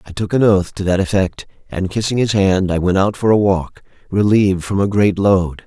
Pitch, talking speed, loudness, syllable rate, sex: 100 Hz, 235 wpm, -16 LUFS, 5.1 syllables/s, male